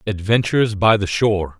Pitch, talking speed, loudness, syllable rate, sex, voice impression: 100 Hz, 150 wpm, -17 LUFS, 5.6 syllables/s, male, masculine, adult-like, slightly thick, tensed, slightly powerful, hard, cool, calm, slightly mature, wild, lively, slightly strict